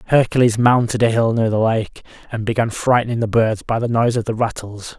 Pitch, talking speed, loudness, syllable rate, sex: 115 Hz, 215 wpm, -17 LUFS, 5.8 syllables/s, male